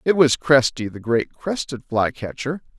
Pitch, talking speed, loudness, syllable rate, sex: 135 Hz, 150 wpm, -21 LUFS, 4.4 syllables/s, male